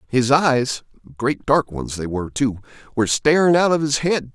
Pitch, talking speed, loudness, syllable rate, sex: 130 Hz, 165 wpm, -19 LUFS, 4.8 syllables/s, male